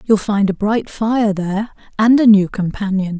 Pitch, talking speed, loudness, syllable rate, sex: 205 Hz, 190 wpm, -16 LUFS, 4.6 syllables/s, female